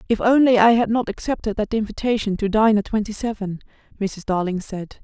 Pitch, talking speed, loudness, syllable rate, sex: 215 Hz, 190 wpm, -20 LUFS, 5.7 syllables/s, female